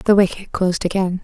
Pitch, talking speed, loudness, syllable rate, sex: 185 Hz, 195 wpm, -19 LUFS, 5.9 syllables/s, female